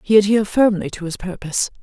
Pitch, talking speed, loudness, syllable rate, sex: 195 Hz, 200 wpm, -18 LUFS, 6.7 syllables/s, female